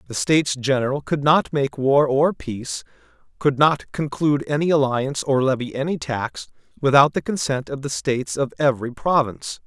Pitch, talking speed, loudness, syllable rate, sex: 135 Hz, 170 wpm, -21 LUFS, 5.3 syllables/s, male